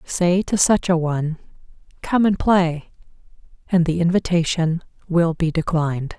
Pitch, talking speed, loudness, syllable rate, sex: 170 Hz, 135 wpm, -20 LUFS, 4.5 syllables/s, female